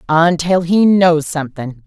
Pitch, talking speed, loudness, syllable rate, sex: 165 Hz, 130 wpm, -13 LUFS, 4.2 syllables/s, female